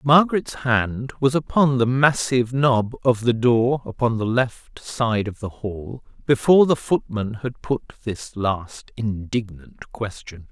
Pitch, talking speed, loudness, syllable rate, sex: 120 Hz, 150 wpm, -21 LUFS, 3.9 syllables/s, male